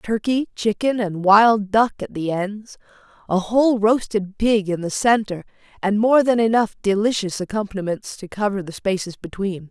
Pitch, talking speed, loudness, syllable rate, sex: 210 Hz, 160 wpm, -20 LUFS, 4.8 syllables/s, female